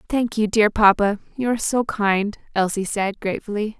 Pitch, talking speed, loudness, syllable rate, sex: 210 Hz, 175 wpm, -20 LUFS, 5.2 syllables/s, female